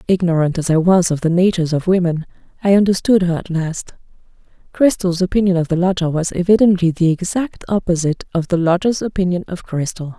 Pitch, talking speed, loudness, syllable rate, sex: 180 Hz, 175 wpm, -17 LUFS, 5.9 syllables/s, female